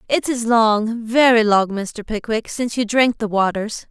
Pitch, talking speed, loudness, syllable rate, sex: 225 Hz, 170 wpm, -18 LUFS, 4.3 syllables/s, female